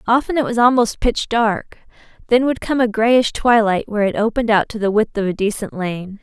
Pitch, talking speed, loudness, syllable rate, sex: 220 Hz, 220 wpm, -17 LUFS, 5.4 syllables/s, female